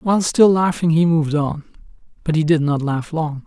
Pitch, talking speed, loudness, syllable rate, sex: 160 Hz, 210 wpm, -17 LUFS, 5.3 syllables/s, male